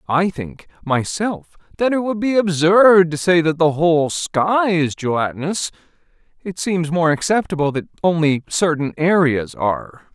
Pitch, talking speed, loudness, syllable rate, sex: 165 Hz, 150 wpm, -18 LUFS, 4.5 syllables/s, male